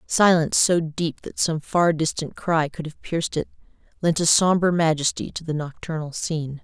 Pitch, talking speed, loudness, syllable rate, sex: 160 Hz, 180 wpm, -22 LUFS, 5.0 syllables/s, female